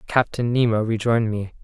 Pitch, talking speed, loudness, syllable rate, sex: 115 Hz, 145 wpm, -21 LUFS, 5.6 syllables/s, male